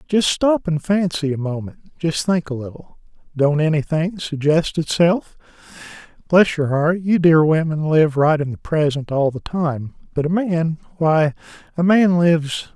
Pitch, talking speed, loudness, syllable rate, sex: 160 Hz, 150 wpm, -18 LUFS, 4.4 syllables/s, male